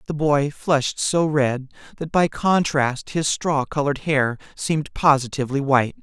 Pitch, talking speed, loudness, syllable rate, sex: 145 Hz, 150 wpm, -21 LUFS, 4.7 syllables/s, male